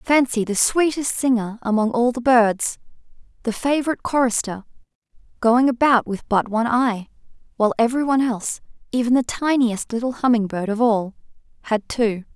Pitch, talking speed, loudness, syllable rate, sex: 235 Hz, 150 wpm, -20 LUFS, 5.4 syllables/s, female